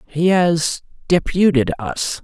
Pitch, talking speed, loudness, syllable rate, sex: 160 Hz, 80 wpm, -17 LUFS, 3.4 syllables/s, male